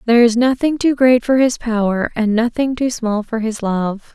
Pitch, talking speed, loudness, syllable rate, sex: 235 Hz, 215 wpm, -16 LUFS, 4.8 syllables/s, female